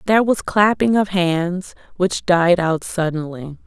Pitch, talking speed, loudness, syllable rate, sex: 180 Hz, 145 wpm, -18 LUFS, 4.0 syllables/s, female